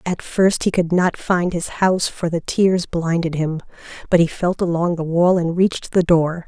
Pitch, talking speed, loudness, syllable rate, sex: 175 Hz, 215 wpm, -18 LUFS, 4.6 syllables/s, female